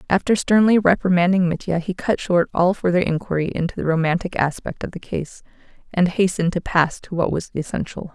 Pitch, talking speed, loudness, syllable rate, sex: 180 Hz, 185 wpm, -20 LUFS, 5.7 syllables/s, female